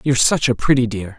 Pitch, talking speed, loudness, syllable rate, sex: 125 Hz, 255 wpm, -17 LUFS, 6.4 syllables/s, male